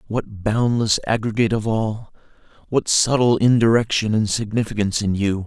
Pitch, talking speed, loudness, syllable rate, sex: 110 Hz, 130 wpm, -19 LUFS, 5.1 syllables/s, male